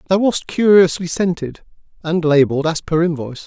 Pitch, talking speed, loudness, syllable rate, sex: 165 Hz, 155 wpm, -16 LUFS, 5.5 syllables/s, male